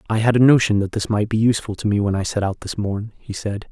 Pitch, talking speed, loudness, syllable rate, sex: 105 Hz, 305 wpm, -19 LUFS, 6.4 syllables/s, male